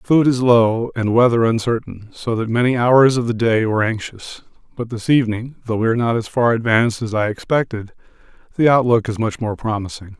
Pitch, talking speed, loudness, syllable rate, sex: 115 Hz, 200 wpm, -17 LUFS, 5.6 syllables/s, male